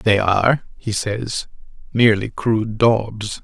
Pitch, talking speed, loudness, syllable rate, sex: 110 Hz, 120 wpm, -19 LUFS, 3.9 syllables/s, male